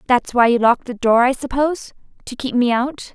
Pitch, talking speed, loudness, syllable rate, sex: 250 Hz, 210 wpm, -17 LUFS, 5.6 syllables/s, female